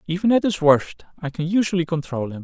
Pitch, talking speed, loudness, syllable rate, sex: 170 Hz, 220 wpm, -20 LUFS, 5.9 syllables/s, male